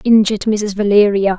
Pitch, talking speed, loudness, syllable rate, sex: 205 Hz, 130 wpm, -14 LUFS, 5.4 syllables/s, female